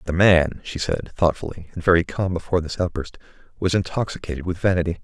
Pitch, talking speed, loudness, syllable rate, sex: 85 Hz, 180 wpm, -22 LUFS, 6.3 syllables/s, male